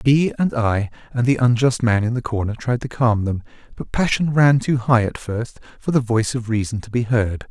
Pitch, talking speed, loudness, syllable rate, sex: 120 Hz, 230 wpm, -20 LUFS, 5.1 syllables/s, male